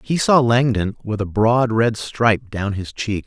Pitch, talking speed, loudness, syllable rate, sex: 110 Hz, 200 wpm, -18 LUFS, 4.2 syllables/s, male